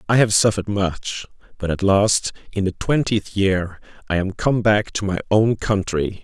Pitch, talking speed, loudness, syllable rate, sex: 100 Hz, 185 wpm, -20 LUFS, 4.5 syllables/s, male